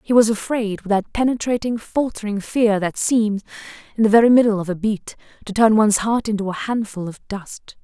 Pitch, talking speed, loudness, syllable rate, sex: 215 Hz, 200 wpm, -19 LUFS, 5.4 syllables/s, female